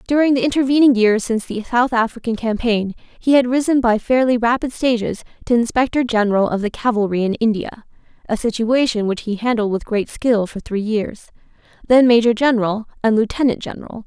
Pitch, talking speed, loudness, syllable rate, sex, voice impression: 230 Hz, 165 wpm, -17 LUFS, 5.7 syllables/s, female, very feminine, young, slightly adult-like, very thin, tensed, powerful, very bright, hard, very clear, very fluent, very cute, intellectual, very refreshing, sincere, calm, very friendly, very reassuring, very unique, elegant, slightly wild, very sweet, very lively, kind, intense, slightly sharp